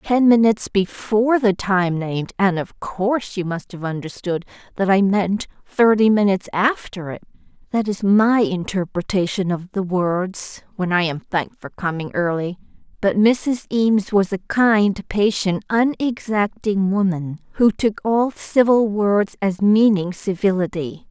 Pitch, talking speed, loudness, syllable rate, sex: 200 Hz, 145 wpm, -19 LUFS, 4.3 syllables/s, female